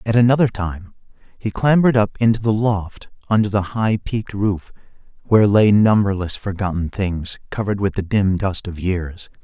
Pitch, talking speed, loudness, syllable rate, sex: 100 Hz, 165 wpm, -19 LUFS, 5.1 syllables/s, male